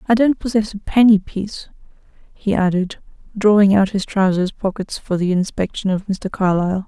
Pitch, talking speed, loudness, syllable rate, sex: 200 Hz, 165 wpm, -18 LUFS, 5.2 syllables/s, female